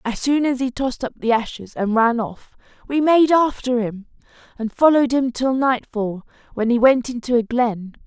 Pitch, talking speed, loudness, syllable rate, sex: 245 Hz, 195 wpm, -19 LUFS, 4.9 syllables/s, female